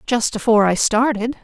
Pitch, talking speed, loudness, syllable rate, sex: 225 Hz, 165 wpm, -17 LUFS, 5.6 syllables/s, female